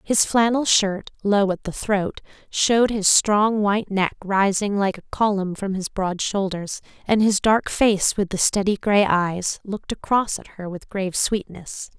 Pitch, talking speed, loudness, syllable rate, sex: 200 Hz, 180 wpm, -21 LUFS, 4.2 syllables/s, female